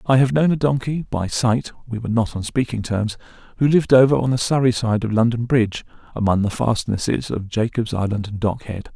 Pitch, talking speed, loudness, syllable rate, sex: 115 Hz, 195 wpm, -20 LUFS, 5.8 syllables/s, male